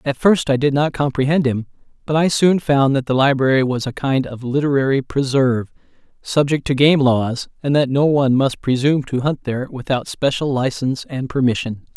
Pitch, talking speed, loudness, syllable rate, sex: 135 Hz, 190 wpm, -18 LUFS, 5.4 syllables/s, male